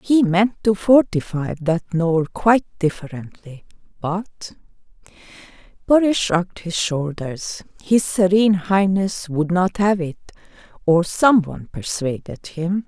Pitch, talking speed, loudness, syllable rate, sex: 185 Hz, 110 wpm, -19 LUFS, 4.0 syllables/s, female